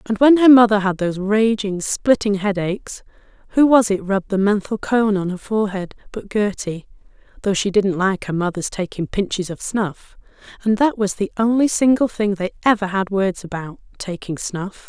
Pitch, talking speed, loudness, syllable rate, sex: 205 Hz, 180 wpm, -19 LUFS, 5.0 syllables/s, female